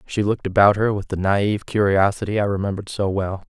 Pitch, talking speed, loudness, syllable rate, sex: 100 Hz, 205 wpm, -20 LUFS, 6.3 syllables/s, male